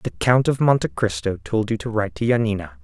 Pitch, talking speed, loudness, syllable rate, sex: 105 Hz, 235 wpm, -21 LUFS, 6.0 syllables/s, male